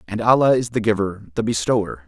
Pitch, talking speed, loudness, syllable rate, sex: 110 Hz, 205 wpm, -19 LUFS, 6.0 syllables/s, male